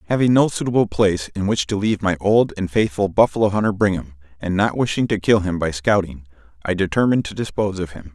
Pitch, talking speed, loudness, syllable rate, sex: 95 Hz, 215 wpm, -19 LUFS, 6.4 syllables/s, male